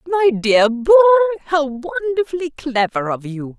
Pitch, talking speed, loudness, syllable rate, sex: 260 Hz, 135 wpm, -16 LUFS, 7.0 syllables/s, female